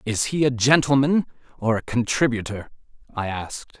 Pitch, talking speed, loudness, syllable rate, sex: 125 Hz, 140 wpm, -22 LUFS, 5.4 syllables/s, male